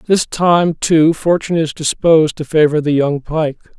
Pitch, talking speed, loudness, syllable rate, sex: 155 Hz, 175 wpm, -14 LUFS, 4.5 syllables/s, male